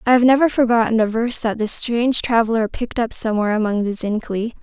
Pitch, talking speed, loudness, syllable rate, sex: 225 Hz, 205 wpm, -18 LUFS, 6.7 syllables/s, female